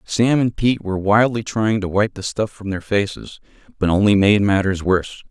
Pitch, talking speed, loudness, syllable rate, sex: 105 Hz, 205 wpm, -18 LUFS, 5.3 syllables/s, male